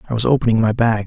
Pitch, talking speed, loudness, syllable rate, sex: 115 Hz, 280 wpm, -16 LUFS, 8.1 syllables/s, male